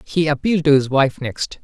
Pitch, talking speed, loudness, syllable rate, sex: 145 Hz, 220 wpm, -18 LUFS, 5.2 syllables/s, male